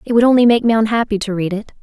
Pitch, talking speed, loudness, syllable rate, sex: 220 Hz, 295 wpm, -15 LUFS, 7.4 syllables/s, female